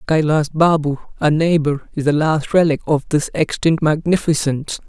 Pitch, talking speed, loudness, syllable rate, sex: 155 Hz, 150 wpm, -17 LUFS, 4.9 syllables/s, male